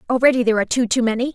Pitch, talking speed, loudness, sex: 240 Hz, 270 wpm, -18 LUFS, female